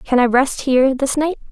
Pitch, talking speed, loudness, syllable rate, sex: 270 Hz, 240 wpm, -16 LUFS, 5.3 syllables/s, female